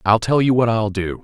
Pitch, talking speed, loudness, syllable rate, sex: 110 Hz, 290 wpm, -17 LUFS, 5.3 syllables/s, male